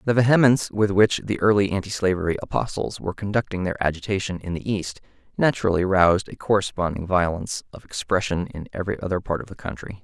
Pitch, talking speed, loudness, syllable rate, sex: 95 Hz, 175 wpm, -23 LUFS, 6.5 syllables/s, male